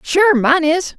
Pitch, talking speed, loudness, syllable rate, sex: 320 Hz, 185 wpm, -14 LUFS, 3.4 syllables/s, female